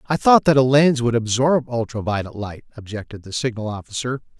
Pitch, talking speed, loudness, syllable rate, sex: 120 Hz, 190 wpm, -19 LUFS, 5.6 syllables/s, male